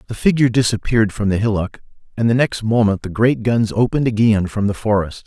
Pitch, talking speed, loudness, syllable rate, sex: 110 Hz, 205 wpm, -17 LUFS, 6.1 syllables/s, male